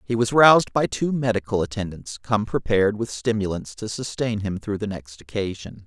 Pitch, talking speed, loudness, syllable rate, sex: 110 Hz, 185 wpm, -22 LUFS, 5.2 syllables/s, male